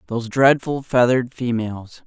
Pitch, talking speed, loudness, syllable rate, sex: 125 Hz, 115 wpm, -19 LUFS, 5.4 syllables/s, male